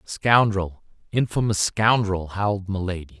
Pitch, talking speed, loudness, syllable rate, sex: 100 Hz, 95 wpm, -22 LUFS, 4.4 syllables/s, male